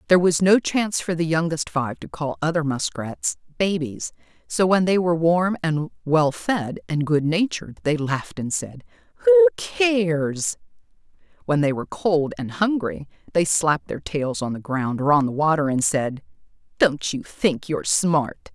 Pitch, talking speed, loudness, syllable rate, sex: 155 Hz, 170 wpm, -22 LUFS, 4.7 syllables/s, female